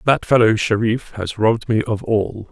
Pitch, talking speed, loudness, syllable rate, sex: 110 Hz, 190 wpm, -18 LUFS, 5.1 syllables/s, male